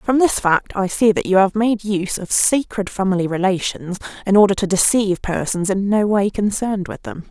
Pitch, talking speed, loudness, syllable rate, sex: 195 Hz, 205 wpm, -18 LUFS, 5.3 syllables/s, female